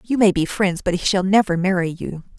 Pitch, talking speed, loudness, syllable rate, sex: 185 Hz, 250 wpm, -19 LUFS, 5.6 syllables/s, female